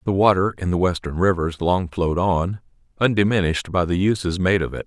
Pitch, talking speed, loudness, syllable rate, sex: 90 Hz, 195 wpm, -21 LUFS, 5.7 syllables/s, male